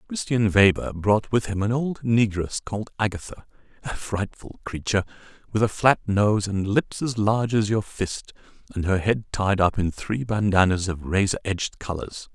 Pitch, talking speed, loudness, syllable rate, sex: 105 Hz, 175 wpm, -23 LUFS, 4.9 syllables/s, male